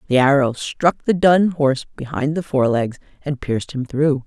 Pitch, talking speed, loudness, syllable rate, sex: 140 Hz, 185 wpm, -19 LUFS, 5.0 syllables/s, female